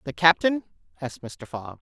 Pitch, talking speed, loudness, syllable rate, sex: 150 Hz, 155 wpm, -25 LUFS, 5.3 syllables/s, female